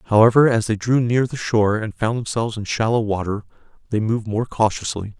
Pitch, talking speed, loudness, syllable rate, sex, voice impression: 110 Hz, 195 wpm, -20 LUFS, 5.8 syllables/s, male, masculine, adult-like, tensed, powerful, clear, slightly nasal, intellectual, slightly refreshing, calm, friendly, reassuring, wild, slightly lively, kind, modest